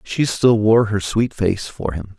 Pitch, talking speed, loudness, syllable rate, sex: 105 Hz, 220 wpm, -18 LUFS, 3.8 syllables/s, male